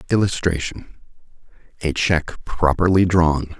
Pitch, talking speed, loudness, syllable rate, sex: 85 Hz, 85 wpm, -19 LUFS, 4.6 syllables/s, male